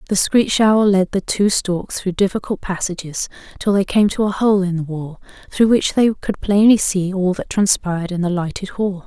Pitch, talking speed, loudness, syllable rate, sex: 190 Hz, 210 wpm, -18 LUFS, 4.9 syllables/s, female